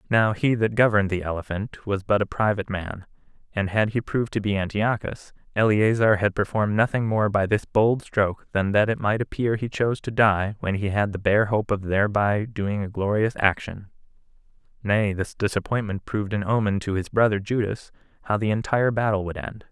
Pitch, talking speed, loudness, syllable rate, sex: 105 Hz, 195 wpm, -23 LUFS, 5.5 syllables/s, male